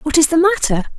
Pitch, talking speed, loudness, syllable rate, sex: 285 Hz, 245 wpm, -15 LUFS, 6.2 syllables/s, female